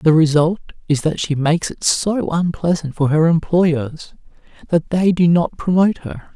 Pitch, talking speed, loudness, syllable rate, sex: 165 Hz, 170 wpm, -17 LUFS, 4.6 syllables/s, male